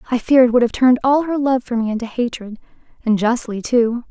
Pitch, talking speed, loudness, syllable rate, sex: 240 Hz, 235 wpm, -17 LUFS, 6.0 syllables/s, female